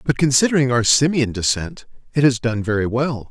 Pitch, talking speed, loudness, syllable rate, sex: 130 Hz, 180 wpm, -18 LUFS, 5.4 syllables/s, male